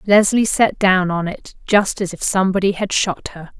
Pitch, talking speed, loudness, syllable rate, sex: 190 Hz, 200 wpm, -17 LUFS, 4.8 syllables/s, female